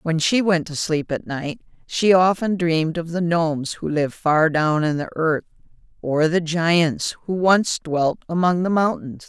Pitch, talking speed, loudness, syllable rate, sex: 165 Hz, 190 wpm, -20 LUFS, 4.3 syllables/s, female